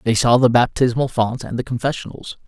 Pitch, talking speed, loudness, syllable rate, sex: 120 Hz, 195 wpm, -18 LUFS, 5.7 syllables/s, male